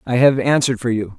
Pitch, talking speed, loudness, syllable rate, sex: 125 Hz, 255 wpm, -17 LUFS, 6.5 syllables/s, male